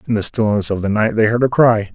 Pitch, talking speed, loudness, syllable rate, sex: 110 Hz, 310 wpm, -16 LUFS, 6.2 syllables/s, male